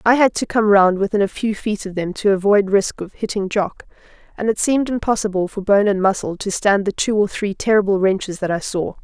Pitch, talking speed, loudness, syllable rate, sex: 200 Hz, 240 wpm, -18 LUFS, 5.6 syllables/s, female